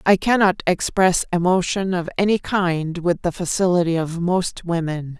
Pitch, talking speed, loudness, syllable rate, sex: 175 Hz, 150 wpm, -20 LUFS, 4.5 syllables/s, female